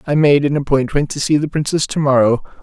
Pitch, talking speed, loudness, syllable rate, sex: 140 Hz, 230 wpm, -16 LUFS, 6.0 syllables/s, male